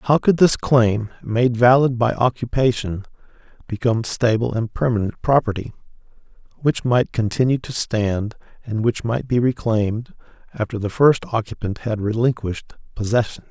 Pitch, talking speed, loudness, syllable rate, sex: 115 Hz, 135 wpm, -20 LUFS, 4.9 syllables/s, male